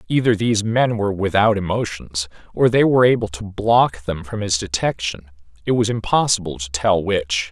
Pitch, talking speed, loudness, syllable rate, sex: 100 Hz, 175 wpm, -19 LUFS, 5.2 syllables/s, male